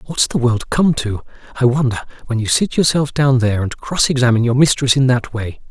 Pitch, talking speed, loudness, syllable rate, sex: 130 Hz, 220 wpm, -16 LUFS, 5.7 syllables/s, male